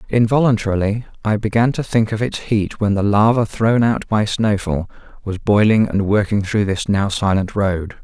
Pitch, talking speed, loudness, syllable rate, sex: 105 Hz, 180 wpm, -17 LUFS, 4.8 syllables/s, male